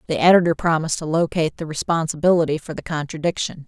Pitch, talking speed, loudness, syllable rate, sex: 160 Hz, 165 wpm, -20 LUFS, 6.8 syllables/s, female